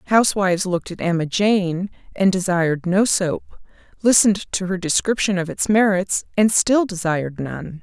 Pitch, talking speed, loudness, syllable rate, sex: 190 Hz, 155 wpm, -19 LUFS, 5.1 syllables/s, female